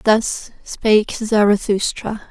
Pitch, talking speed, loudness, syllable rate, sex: 210 Hz, 80 wpm, -17 LUFS, 3.5 syllables/s, female